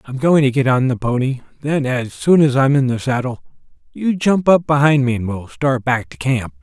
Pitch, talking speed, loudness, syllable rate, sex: 135 Hz, 235 wpm, -17 LUFS, 5.0 syllables/s, male